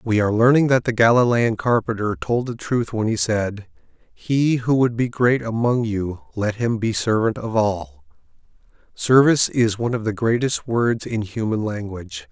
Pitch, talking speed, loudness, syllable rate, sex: 115 Hz, 175 wpm, -20 LUFS, 4.7 syllables/s, male